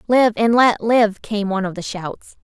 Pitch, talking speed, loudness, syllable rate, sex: 215 Hz, 215 wpm, -18 LUFS, 4.6 syllables/s, female